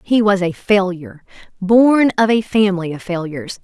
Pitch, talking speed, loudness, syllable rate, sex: 195 Hz, 165 wpm, -16 LUFS, 5.2 syllables/s, female